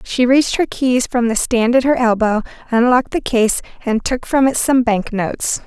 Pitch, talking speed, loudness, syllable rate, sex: 240 Hz, 210 wpm, -16 LUFS, 5.0 syllables/s, female